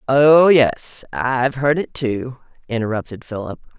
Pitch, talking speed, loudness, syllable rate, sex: 125 Hz, 125 wpm, -18 LUFS, 4.2 syllables/s, female